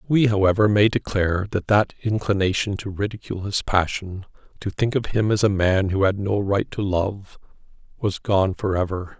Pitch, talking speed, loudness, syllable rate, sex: 100 Hz, 175 wpm, -22 LUFS, 5.0 syllables/s, male